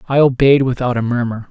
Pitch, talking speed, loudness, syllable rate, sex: 125 Hz, 200 wpm, -15 LUFS, 6.0 syllables/s, male